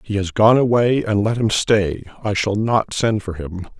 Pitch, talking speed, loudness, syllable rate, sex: 105 Hz, 220 wpm, -18 LUFS, 4.7 syllables/s, male